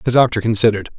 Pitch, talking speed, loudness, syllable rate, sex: 110 Hz, 185 wpm, -15 LUFS, 8.1 syllables/s, male